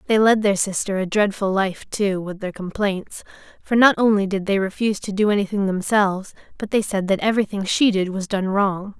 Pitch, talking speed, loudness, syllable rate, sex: 200 Hz, 205 wpm, -20 LUFS, 5.4 syllables/s, female